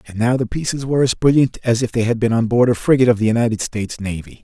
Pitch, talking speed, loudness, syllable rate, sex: 120 Hz, 285 wpm, -17 LUFS, 7.0 syllables/s, male